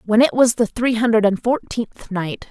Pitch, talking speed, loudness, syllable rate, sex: 225 Hz, 215 wpm, -18 LUFS, 4.6 syllables/s, female